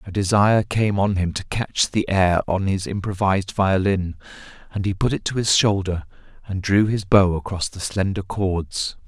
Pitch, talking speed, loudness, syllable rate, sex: 95 Hz, 185 wpm, -21 LUFS, 4.7 syllables/s, male